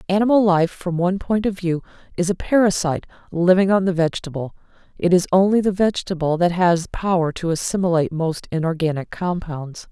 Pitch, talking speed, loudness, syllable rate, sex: 180 Hz, 165 wpm, -20 LUFS, 5.8 syllables/s, female